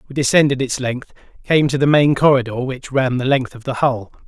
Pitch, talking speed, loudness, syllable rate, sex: 130 Hz, 225 wpm, -17 LUFS, 5.4 syllables/s, male